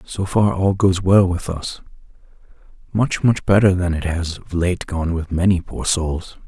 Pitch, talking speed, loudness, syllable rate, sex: 90 Hz, 175 wpm, -19 LUFS, 4.3 syllables/s, male